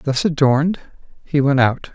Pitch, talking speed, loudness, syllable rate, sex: 145 Hz, 155 wpm, -17 LUFS, 4.5 syllables/s, male